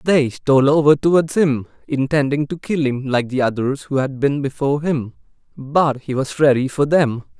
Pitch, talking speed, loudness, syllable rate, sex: 140 Hz, 185 wpm, -18 LUFS, 4.9 syllables/s, male